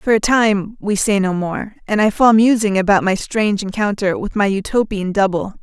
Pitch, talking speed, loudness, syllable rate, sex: 205 Hz, 205 wpm, -16 LUFS, 5.0 syllables/s, female